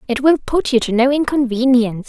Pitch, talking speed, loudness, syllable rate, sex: 255 Hz, 200 wpm, -16 LUFS, 5.8 syllables/s, female